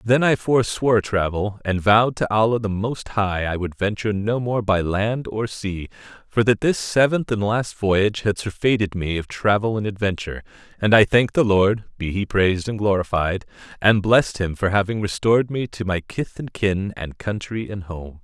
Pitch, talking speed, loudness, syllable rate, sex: 105 Hz, 195 wpm, -21 LUFS, 4.7 syllables/s, male